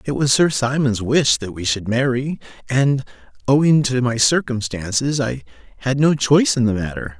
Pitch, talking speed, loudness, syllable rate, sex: 120 Hz, 175 wpm, -18 LUFS, 4.9 syllables/s, male